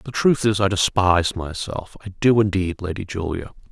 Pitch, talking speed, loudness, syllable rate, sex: 95 Hz, 160 wpm, -21 LUFS, 5.1 syllables/s, male